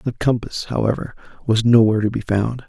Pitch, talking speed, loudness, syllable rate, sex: 115 Hz, 180 wpm, -19 LUFS, 5.8 syllables/s, male